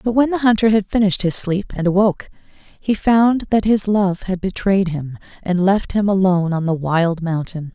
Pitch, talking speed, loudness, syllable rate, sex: 190 Hz, 200 wpm, -17 LUFS, 5.0 syllables/s, female